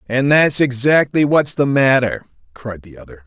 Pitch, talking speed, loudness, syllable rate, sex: 130 Hz, 165 wpm, -15 LUFS, 4.6 syllables/s, male